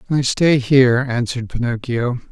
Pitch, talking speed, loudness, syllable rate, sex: 125 Hz, 130 wpm, -17 LUFS, 4.9 syllables/s, male